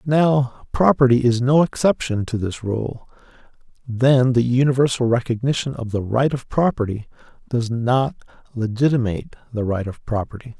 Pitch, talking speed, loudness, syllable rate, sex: 125 Hz, 135 wpm, -20 LUFS, 4.8 syllables/s, male